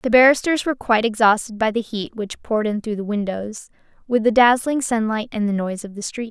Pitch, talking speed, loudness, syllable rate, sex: 220 Hz, 230 wpm, -20 LUFS, 6.0 syllables/s, female